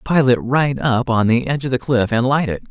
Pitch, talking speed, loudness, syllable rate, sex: 125 Hz, 290 wpm, -17 LUFS, 5.5 syllables/s, male